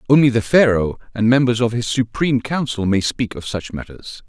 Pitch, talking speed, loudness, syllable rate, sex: 115 Hz, 195 wpm, -18 LUFS, 5.3 syllables/s, male